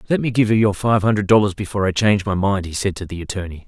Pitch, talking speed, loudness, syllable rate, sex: 100 Hz, 295 wpm, -19 LUFS, 7.2 syllables/s, male